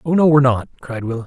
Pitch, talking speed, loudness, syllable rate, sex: 135 Hz, 285 wpm, -16 LUFS, 7.6 syllables/s, male